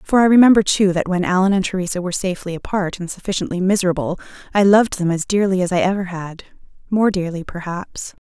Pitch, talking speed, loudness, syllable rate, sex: 185 Hz, 195 wpm, -18 LUFS, 6.5 syllables/s, female